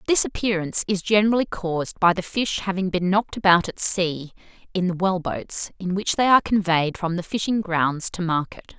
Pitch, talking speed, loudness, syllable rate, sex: 185 Hz, 200 wpm, -22 LUFS, 5.3 syllables/s, female